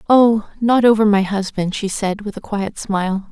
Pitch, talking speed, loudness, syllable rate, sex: 205 Hz, 200 wpm, -17 LUFS, 4.6 syllables/s, female